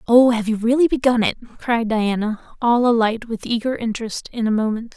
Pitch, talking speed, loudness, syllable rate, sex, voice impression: 230 Hz, 195 wpm, -19 LUFS, 5.5 syllables/s, female, very feminine, young, thin, tensed, powerful, bright, soft, very clear, very fluent, very cute, slightly intellectual, very refreshing, slightly sincere, calm, friendly, reassuring, very unique, elegant, slightly wild, sweet, very lively, strict, intense, sharp, light